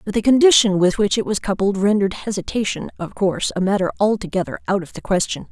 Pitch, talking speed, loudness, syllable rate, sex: 200 Hz, 205 wpm, -19 LUFS, 6.4 syllables/s, female